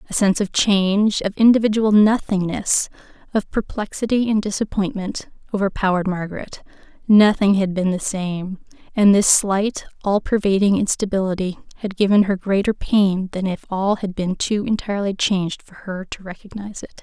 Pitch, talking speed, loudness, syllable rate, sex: 195 Hz, 150 wpm, -19 LUFS, 5.2 syllables/s, female